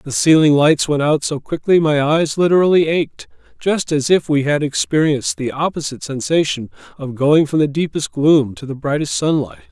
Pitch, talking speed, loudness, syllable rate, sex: 150 Hz, 185 wpm, -16 LUFS, 5.1 syllables/s, male